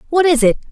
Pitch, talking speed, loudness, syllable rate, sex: 300 Hz, 255 wpm, -14 LUFS, 8.1 syllables/s, female